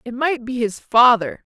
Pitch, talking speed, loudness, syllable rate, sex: 245 Hz, 190 wpm, -17 LUFS, 4.4 syllables/s, female